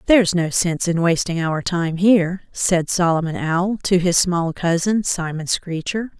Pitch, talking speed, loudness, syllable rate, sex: 175 Hz, 165 wpm, -19 LUFS, 4.5 syllables/s, female